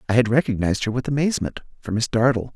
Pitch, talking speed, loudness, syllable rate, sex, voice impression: 120 Hz, 210 wpm, -21 LUFS, 7.2 syllables/s, male, masculine, adult-like, tensed, bright, slightly raspy, slightly refreshing, friendly, slightly reassuring, unique, wild, lively, kind